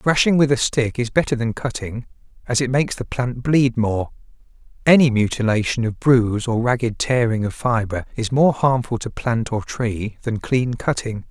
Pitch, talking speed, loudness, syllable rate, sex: 120 Hz, 180 wpm, -20 LUFS, 4.8 syllables/s, male